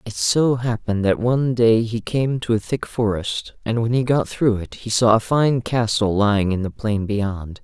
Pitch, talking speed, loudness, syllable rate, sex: 110 Hz, 220 wpm, -20 LUFS, 4.6 syllables/s, male